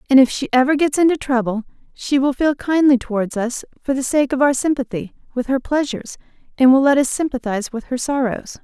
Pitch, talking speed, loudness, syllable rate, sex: 260 Hz, 210 wpm, -18 LUFS, 5.9 syllables/s, female